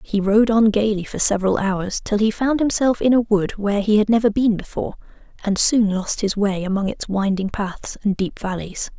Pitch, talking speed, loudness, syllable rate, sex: 210 Hz, 215 wpm, -19 LUFS, 5.2 syllables/s, female